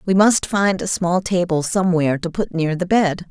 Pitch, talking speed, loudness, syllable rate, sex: 175 Hz, 220 wpm, -18 LUFS, 5.1 syllables/s, female